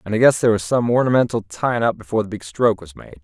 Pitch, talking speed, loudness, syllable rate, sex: 110 Hz, 280 wpm, -19 LUFS, 7.2 syllables/s, male